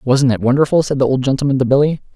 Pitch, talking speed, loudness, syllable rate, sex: 135 Hz, 250 wpm, -15 LUFS, 7.0 syllables/s, male